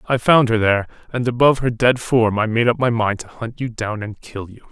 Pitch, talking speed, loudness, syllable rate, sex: 115 Hz, 265 wpm, -18 LUFS, 5.6 syllables/s, male